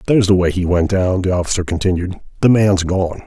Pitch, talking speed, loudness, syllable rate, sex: 95 Hz, 220 wpm, -16 LUFS, 6.0 syllables/s, male